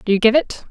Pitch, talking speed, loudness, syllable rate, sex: 235 Hz, 340 wpm, -16 LUFS, 7.0 syllables/s, female